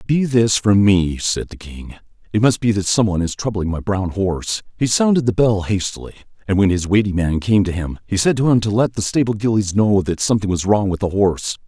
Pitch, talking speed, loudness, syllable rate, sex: 100 Hz, 245 wpm, -18 LUFS, 5.7 syllables/s, male